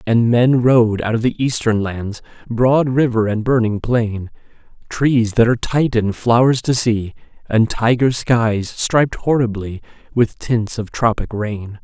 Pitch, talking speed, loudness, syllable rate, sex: 115 Hz, 150 wpm, -17 LUFS, 4.0 syllables/s, male